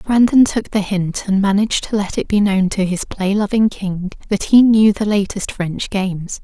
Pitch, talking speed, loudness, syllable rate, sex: 200 Hz, 215 wpm, -16 LUFS, 4.7 syllables/s, female